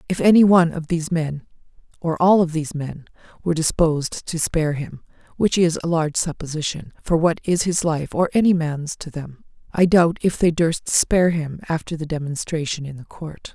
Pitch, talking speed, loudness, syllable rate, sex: 160 Hz, 185 wpm, -20 LUFS, 5.4 syllables/s, female